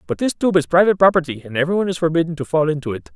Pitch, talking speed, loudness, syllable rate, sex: 165 Hz, 265 wpm, -18 LUFS, 8.1 syllables/s, male